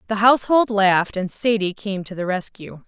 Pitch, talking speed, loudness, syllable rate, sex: 205 Hz, 190 wpm, -19 LUFS, 5.2 syllables/s, female